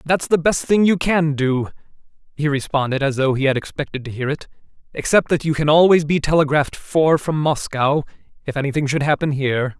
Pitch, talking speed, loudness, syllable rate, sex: 150 Hz, 195 wpm, -18 LUFS, 5.7 syllables/s, male